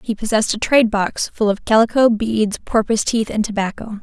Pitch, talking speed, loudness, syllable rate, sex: 220 Hz, 195 wpm, -17 LUFS, 5.7 syllables/s, female